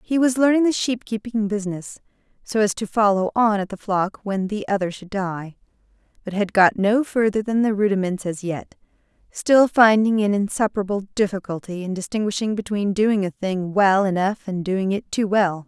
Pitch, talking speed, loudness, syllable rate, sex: 205 Hz, 180 wpm, -21 LUFS, 5.1 syllables/s, female